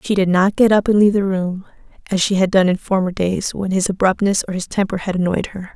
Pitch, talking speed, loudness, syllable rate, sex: 190 Hz, 260 wpm, -17 LUFS, 6.0 syllables/s, female